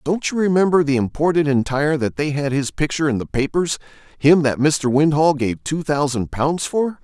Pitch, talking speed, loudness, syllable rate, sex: 150 Hz, 190 wpm, -19 LUFS, 5.2 syllables/s, male